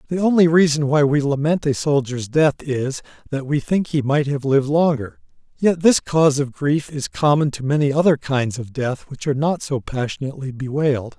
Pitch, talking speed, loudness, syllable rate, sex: 145 Hz, 200 wpm, -19 LUFS, 5.3 syllables/s, male